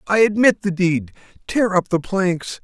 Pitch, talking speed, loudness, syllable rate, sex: 185 Hz, 160 wpm, -18 LUFS, 4.3 syllables/s, male